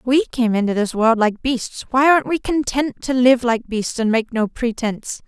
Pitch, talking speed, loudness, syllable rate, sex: 240 Hz, 205 wpm, -18 LUFS, 4.7 syllables/s, female